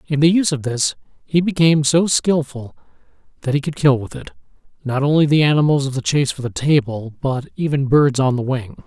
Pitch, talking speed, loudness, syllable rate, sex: 140 Hz, 210 wpm, -17 LUFS, 5.8 syllables/s, male